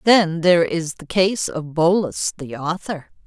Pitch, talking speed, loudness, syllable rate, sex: 170 Hz, 165 wpm, -20 LUFS, 4.0 syllables/s, female